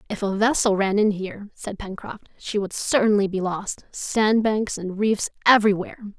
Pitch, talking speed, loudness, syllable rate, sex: 205 Hz, 165 wpm, -22 LUFS, 5.0 syllables/s, female